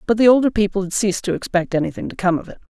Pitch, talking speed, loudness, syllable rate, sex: 200 Hz, 290 wpm, -19 LUFS, 7.7 syllables/s, female